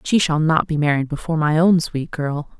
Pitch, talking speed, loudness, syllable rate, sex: 155 Hz, 255 wpm, -19 LUFS, 6.1 syllables/s, female